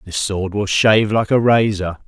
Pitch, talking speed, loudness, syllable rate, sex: 105 Hz, 205 wpm, -16 LUFS, 4.7 syllables/s, male